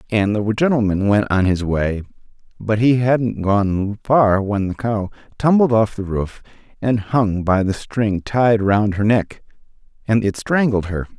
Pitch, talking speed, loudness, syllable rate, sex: 105 Hz, 170 wpm, -18 LUFS, 4.0 syllables/s, male